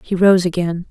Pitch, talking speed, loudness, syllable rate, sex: 180 Hz, 200 wpm, -15 LUFS, 5.1 syllables/s, female